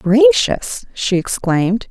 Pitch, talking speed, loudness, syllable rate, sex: 210 Hz, 95 wpm, -16 LUFS, 3.3 syllables/s, female